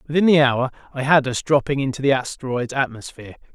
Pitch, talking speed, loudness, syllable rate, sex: 135 Hz, 185 wpm, -20 LUFS, 6.4 syllables/s, male